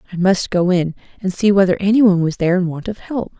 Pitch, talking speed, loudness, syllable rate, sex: 190 Hz, 250 wpm, -17 LUFS, 6.3 syllables/s, female